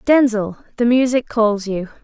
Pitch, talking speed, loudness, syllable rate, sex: 230 Hz, 145 wpm, -17 LUFS, 4.2 syllables/s, female